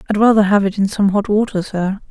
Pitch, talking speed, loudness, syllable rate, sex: 205 Hz, 255 wpm, -16 LUFS, 6.0 syllables/s, female